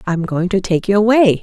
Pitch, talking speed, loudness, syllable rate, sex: 195 Hz, 250 wpm, -15 LUFS, 5.4 syllables/s, female